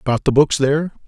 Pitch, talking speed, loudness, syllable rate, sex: 140 Hz, 225 wpm, -17 LUFS, 5.8 syllables/s, male